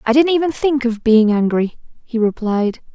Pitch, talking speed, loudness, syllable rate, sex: 240 Hz, 185 wpm, -17 LUFS, 4.9 syllables/s, female